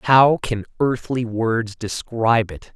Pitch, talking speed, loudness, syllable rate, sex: 115 Hz, 130 wpm, -20 LUFS, 3.5 syllables/s, male